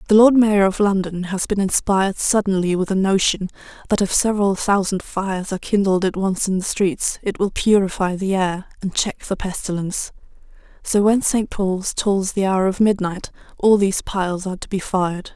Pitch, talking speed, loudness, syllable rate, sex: 195 Hz, 190 wpm, -19 LUFS, 5.2 syllables/s, female